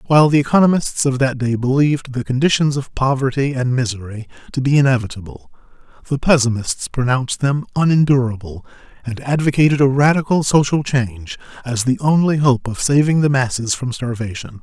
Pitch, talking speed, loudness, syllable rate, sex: 130 Hz, 150 wpm, -17 LUFS, 5.7 syllables/s, male